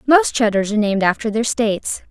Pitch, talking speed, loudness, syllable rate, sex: 225 Hz, 200 wpm, -18 LUFS, 6.4 syllables/s, female